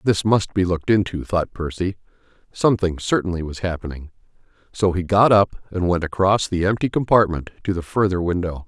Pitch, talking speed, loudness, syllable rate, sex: 90 Hz, 175 wpm, -20 LUFS, 5.5 syllables/s, male